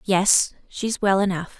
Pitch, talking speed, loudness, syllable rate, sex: 195 Hz, 150 wpm, -21 LUFS, 3.8 syllables/s, female